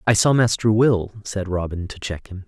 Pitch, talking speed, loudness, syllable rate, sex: 100 Hz, 220 wpm, -20 LUFS, 5.0 syllables/s, male